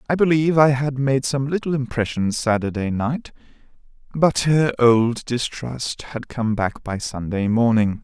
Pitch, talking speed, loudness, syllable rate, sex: 125 Hz, 150 wpm, -20 LUFS, 4.3 syllables/s, male